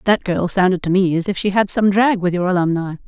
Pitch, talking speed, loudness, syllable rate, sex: 190 Hz, 275 wpm, -17 LUFS, 5.9 syllables/s, female